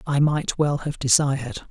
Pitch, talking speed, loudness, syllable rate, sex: 140 Hz, 175 wpm, -22 LUFS, 4.7 syllables/s, male